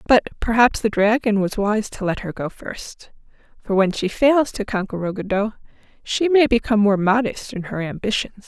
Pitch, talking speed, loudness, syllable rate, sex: 215 Hz, 185 wpm, -20 LUFS, 5.0 syllables/s, female